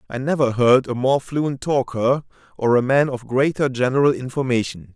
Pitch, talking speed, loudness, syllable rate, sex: 130 Hz, 170 wpm, -20 LUFS, 5.0 syllables/s, male